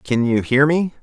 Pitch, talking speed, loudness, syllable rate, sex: 135 Hz, 235 wpm, -17 LUFS, 4.3 syllables/s, male